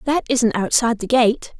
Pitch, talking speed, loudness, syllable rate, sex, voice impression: 235 Hz, 190 wpm, -18 LUFS, 5.1 syllables/s, female, feminine, slightly adult-like, slightly powerful, slightly clear, intellectual, slightly sharp